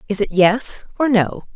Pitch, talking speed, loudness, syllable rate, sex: 215 Hz, 190 wpm, -17 LUFS, 4.2 syllables/s, female